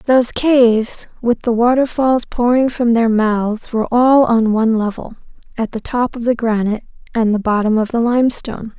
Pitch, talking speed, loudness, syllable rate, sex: 235 Hz, 180 wpm, -15 LUFS, 5.1 syllables/s, female